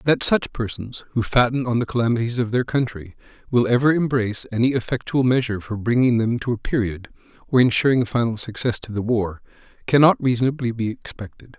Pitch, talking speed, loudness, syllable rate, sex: 120 Hz, 175 wpm, -21 LUFS, 5.9 syllables/s, male